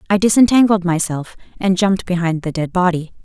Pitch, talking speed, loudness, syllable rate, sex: 185 Hz, 165 wpm, -16 LUFS, 5.8 syllables/s, female